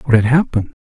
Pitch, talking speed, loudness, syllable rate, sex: 125 Hz, 215 wpm, -15 LUFS, 7.7 syllables/s, male